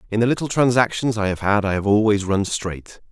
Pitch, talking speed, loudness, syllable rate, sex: 110 Hz, 230 wpm, -20 LUFS, 5.7 syllables/s, male